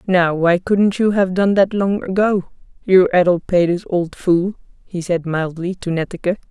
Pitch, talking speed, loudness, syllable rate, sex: 185 Hz, 165 wpm, -17 LUFS, 4.5 syllables/s, female